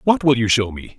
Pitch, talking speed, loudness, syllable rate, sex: 125 Hz, 305 wpm, -18 LUFS, 5.6 syllables/s, male